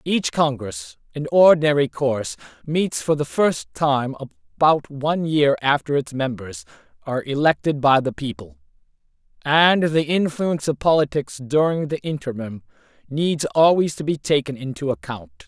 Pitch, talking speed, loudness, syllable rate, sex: 145 Hz, 140 wpm, -20 LUFS, 4.7 syllables/s, male